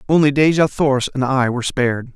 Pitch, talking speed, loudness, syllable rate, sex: 135 Hz, 195 wpm, -17 LUFS, 6.2 syllables/s, male